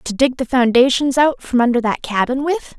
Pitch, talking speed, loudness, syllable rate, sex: 260 Hz, 215 wpm, -16 LUFS, 5.1 syllables/s, female